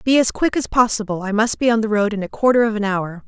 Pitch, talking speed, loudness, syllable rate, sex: 220 Hz, 310 wpm, -18 LUFS, 6.3 syllables/s, female